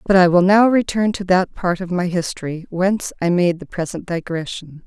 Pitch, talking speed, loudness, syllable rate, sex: 180 Hz, 210 wpm, -18 LUFS, 5.2 syllables/s, female